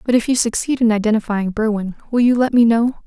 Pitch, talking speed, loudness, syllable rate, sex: 225 Hz, 235 wpm, -17 LUFS, 6.2 syllables/s, female